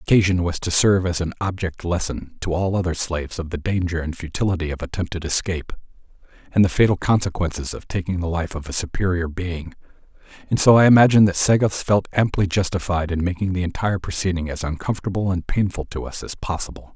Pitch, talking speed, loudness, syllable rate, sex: 90 Hz, 195 wpm, -21 LUFS, 6.4 syllables/s, male